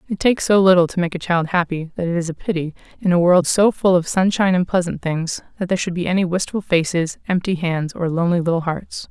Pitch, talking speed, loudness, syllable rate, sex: 175 Hz, 245 wpm, -19 LUFS, 6.2 syllables/s, female